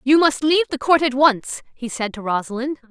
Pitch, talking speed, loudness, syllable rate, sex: 265 Hz, 225 wpm, -19 LUFS, 5.6 syllables/s, female